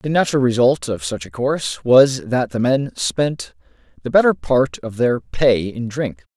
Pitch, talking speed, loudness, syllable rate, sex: 120 Hz, 190 wpm, -18 LUFS, 4.4 syllables/s, male